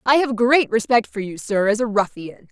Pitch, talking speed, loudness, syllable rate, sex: 225 Hz, 240 wpm, -19 LUFS, 5.0 syllables/s, female